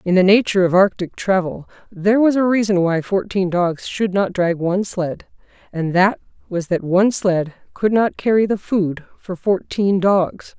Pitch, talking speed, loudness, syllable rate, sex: 190 Hz, 180 wpm, -18 LUFS, 4.7 syllables/s, female